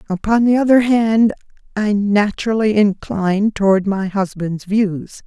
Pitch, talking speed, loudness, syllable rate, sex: 205 Hz, 125 wpm, -16 LUFS, 4.3 syllables/s, female